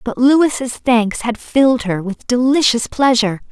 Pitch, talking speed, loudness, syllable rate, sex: 245 Hz, 155 wpm, -15 LUFS, 4.2 syllables/s, female